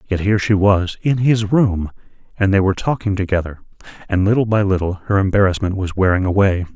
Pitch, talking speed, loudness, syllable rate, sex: 100 Hz, 185 wpm, -17 LUFS, 6.0 syllables/s, male